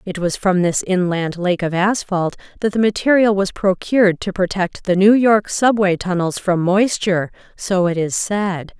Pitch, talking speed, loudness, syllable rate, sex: 190 Hz, 175 wpm, -17 LUFS, 4.6 syllables/s, female